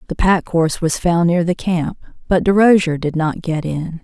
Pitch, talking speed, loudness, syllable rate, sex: 170 Hz, 210 wpm, -17 LUFS, 4.8 syllables/s, female